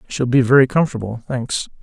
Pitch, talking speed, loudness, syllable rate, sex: 125 Hz, 200 wpm, -17 LUFS, 6.8 syllables/s, male